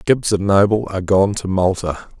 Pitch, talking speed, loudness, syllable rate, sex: 100 Hz, 190 wpm, -17 LUFS, 5.1 syllables/s, male